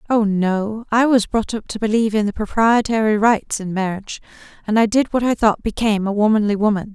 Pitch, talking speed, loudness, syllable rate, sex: 215 Hz, 205 wpm, -18 LUFS, 5.8 syllables/s, female